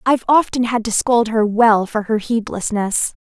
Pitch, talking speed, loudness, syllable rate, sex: 225 Hz, 185 wpm, -17 LUFS, 4.6 syllables/s, female